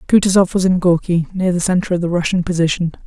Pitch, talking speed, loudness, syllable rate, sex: 180 Hz, 215 wpm, -16 LUFS, 6.6 syllables/s, female